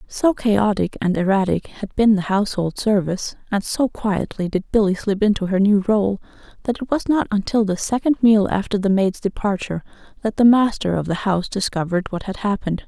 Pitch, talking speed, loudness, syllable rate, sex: 205 Hz, 190 wpm, -20 LUFS, 5.5 syllables/s, female